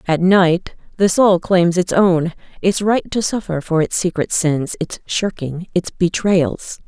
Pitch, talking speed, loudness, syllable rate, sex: 180 Hz, 155 wpm, -17 LUFS, 3.8 syllables/s, female